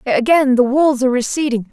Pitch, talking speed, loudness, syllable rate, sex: 260 Hz, 175 wpm, -15 LUFS, 5.7 syllables/s, female